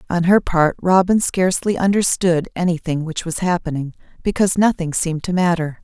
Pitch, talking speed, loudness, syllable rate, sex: 175 Hz, 155 wpm, -18 LUFS, 5.5 syllables/s, female